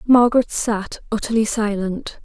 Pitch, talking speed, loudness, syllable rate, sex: 220 Hz, 105 wpm, -19 LUFS, 4.4 syllables/s, female